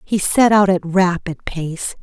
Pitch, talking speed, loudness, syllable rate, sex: 185 Hz, 180 wpm, -17 LUFS, 3.7 syllables/s, female